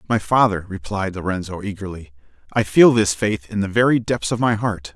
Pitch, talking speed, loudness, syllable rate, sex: 105 Hz, 195 wpm, -19 LUFS, 5.3 syllables/s, male